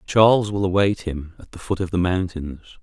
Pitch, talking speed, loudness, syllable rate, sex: 95 Hz, 210 wpm, -21 LUFS, 5.3 syllables/s, male